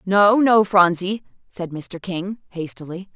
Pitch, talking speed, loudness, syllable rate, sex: 190 Hz, 135 wpm, -19 LUFS, 3.7 syllables/s, female